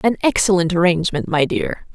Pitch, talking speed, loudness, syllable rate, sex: 180 Hz, 155 wpm, -18 LUFS, 5.7 syllables/s, female